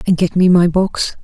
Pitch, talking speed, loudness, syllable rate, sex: 180 Hz, 245 wpm, -14 LUFS, 4.8 syllables/s, female